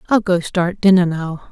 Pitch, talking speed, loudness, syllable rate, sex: 180 Hz, 200 wpm, -16 LUFS, 4.7 syllables/s, female